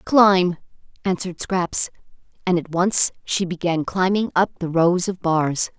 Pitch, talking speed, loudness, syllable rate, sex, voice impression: 180 Hz, 145 wpm, -20 LUFS, 4.0 syllables/s, female, feminine, slightly adult-like, slightly bright, clear, slightly refreshing, friendly